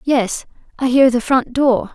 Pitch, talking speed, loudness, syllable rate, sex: 255 Hz, 185 wpm, -16 LUFS, 3.9 syllables/s, female